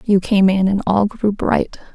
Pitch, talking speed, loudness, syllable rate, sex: 200 Hz, 215 wpm, -16 LUFS, 4.2 syllables/s, female